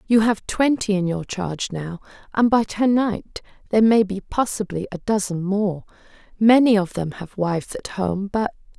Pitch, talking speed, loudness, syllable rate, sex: 200 Hz, 180 wpm, -21 LUFS, 4.8 syllables/s, female